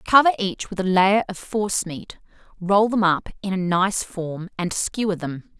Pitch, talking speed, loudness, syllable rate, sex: 185 Hz, 180 wpm, -22 LUFS, 4.5 syllables/s, female